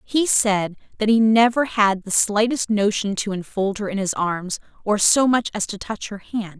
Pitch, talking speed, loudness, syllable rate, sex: 210 Hz, 210 wpm, -20 LUFS, 4.5 syllables/s, female